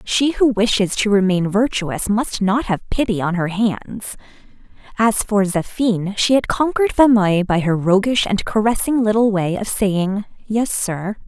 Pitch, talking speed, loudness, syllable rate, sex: 210 Hz, 165 wpm, -18 LUFS, 4.4 syllables/s, female